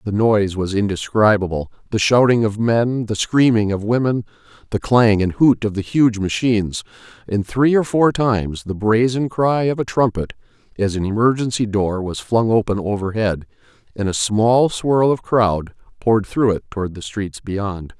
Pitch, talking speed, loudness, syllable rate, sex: 110 Hz, 175 wpm, -18 LUFS, 4.7 syllables/s, male